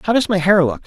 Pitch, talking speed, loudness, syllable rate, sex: 185 Hz, 345 wpm, -15 LUFS, 7.3 syllables/s, male